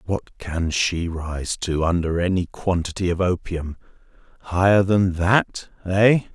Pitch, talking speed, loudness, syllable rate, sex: 90 Hz, 125 wpm, -21 LUFS, 3.8 syllables/s, male